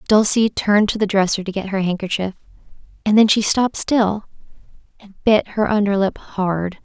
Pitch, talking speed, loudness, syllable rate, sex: 205 Hz, 165 wpm, -18 LUFS, 5.3 syllables/s, female